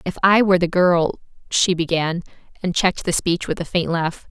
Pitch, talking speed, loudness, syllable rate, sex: 175 Hz, 210 wpm, -19 LUFS, 5.3 syllables/s, female